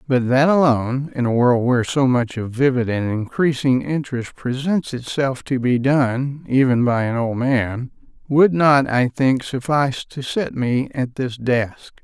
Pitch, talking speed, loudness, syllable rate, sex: 130 Hz, 175 wpm, -19 LUFS, 4.3 syllables/s, male